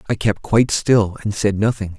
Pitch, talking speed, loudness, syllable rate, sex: 105 Hz, 210 wpm, -18 LUFS, 5.1 syllables/s, male